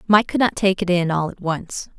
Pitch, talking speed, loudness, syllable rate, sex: 185 Hz, 270 wpm, -20 LUFS, 5.1 syllables/s, female